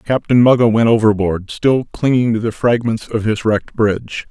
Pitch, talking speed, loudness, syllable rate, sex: 115 Hz, 180 wpm, -15 LUFS, 5.0 syllables/s, male